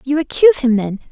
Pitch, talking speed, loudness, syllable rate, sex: 265 Hz, 215 wpm, -14 LUFS, 6.5 syllables/s, female